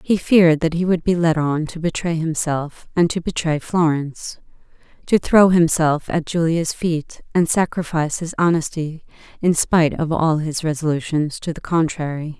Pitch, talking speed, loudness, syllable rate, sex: 160 Hz, 160 wpm, -19 LUFS, 4.8 syllables/s, female